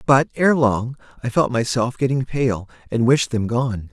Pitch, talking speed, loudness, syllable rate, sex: 120 Hz, 185 wpm, -20 LUFS, 4.3 syllables/s, male